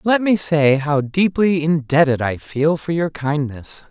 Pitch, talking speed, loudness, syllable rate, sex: 155 Hz, 170 wpm, -18 LUFS, 4.0 syllables/s, male